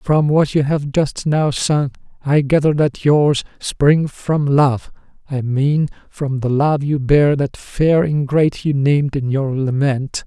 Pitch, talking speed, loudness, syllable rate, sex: 145 Hz, 170 wpm, -17 LUFS, 3.7 syllables/s, male